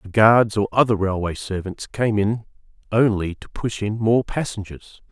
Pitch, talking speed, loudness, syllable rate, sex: 105 Hz, 165 wpm, -21 LUFS, 4.4 syllables/s, male